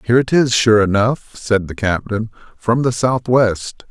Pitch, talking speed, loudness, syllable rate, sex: 115 Hz, 170 wpm, -16 LUFS, 4.3 syllables/s, male